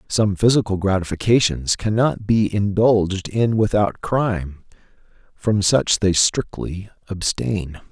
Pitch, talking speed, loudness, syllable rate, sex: 100 Hz, 105 wpm, -19 LUFS, 4.0 syllables/s, male